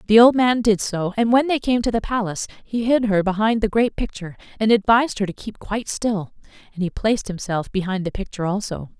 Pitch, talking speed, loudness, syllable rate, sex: 210 Hz, 225 wpm, -20 LUFS, 6.1 syllables/s, female